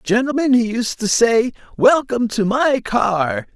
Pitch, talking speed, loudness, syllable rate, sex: 235 Hz, 150 wpm, -17 LUFS, 4.1 syllables/s, male